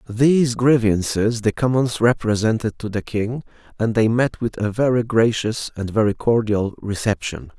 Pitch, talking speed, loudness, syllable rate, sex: 110 Hz, 150 wpm, -20 LUFS, 4.6 syllables/s, male